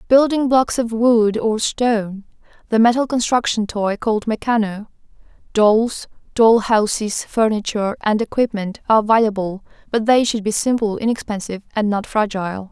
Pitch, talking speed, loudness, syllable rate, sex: 220 Hz, 135 wpm, -18 LUFS, 5.0 syllables/s, female